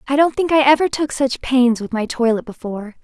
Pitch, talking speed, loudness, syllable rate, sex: 260 Hz, 235 wpm, -17 LUFS, 5.7 syllables/s, female